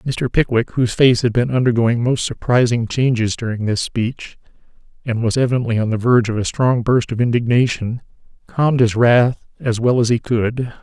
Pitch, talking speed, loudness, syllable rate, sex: 120 Hz, 185 wpm, -17 LUFS, 5.2 syllables/s, male